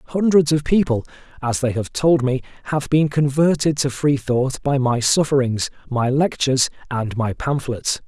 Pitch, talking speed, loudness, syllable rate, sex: 135 Hz, 155 wpm, -19 LUFS, 4.6 syllables/s, male